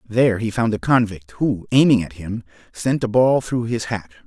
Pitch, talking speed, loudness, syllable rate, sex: 110 Hz, 210 wpm, -19 LUFS, 5.0 syllables/s, male